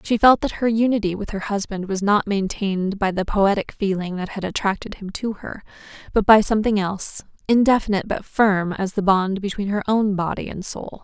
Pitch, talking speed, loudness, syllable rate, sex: 200 Hz, 195 wpm, -21 LUFS, 5.4 syllables/s, female